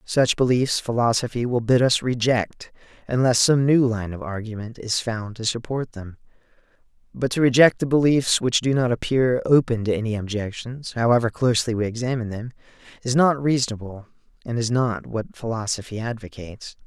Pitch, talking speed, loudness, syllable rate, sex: 120 Hz, 160 wpm, -22 LUFS, 5.4 syllables/s, male